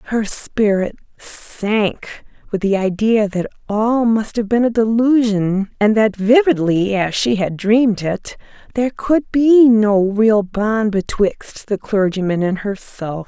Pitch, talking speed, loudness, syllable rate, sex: 215 Hz, 145 wpm, -16 LUFS, 3.8 syllables/s, female